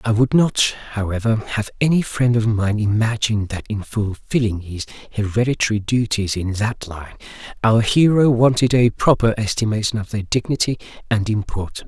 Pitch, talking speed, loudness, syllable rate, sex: 110 Hz, 150 wpm, -19 LUFS, 5.2 syllables/s, male